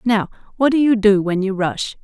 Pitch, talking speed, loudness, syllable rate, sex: 210 Hz, 235 wpm, -17 LUFS, 5.0 syllables/s, female